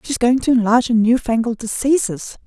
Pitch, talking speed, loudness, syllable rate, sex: 240 Hz, 220 wpm, -17 LUFS, 6.1 syllables/s, female